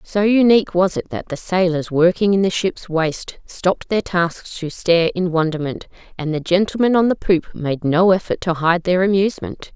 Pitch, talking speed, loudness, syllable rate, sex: 180 Hz, 195 wpm, -18 LUFS, 5.0 syllables/s, female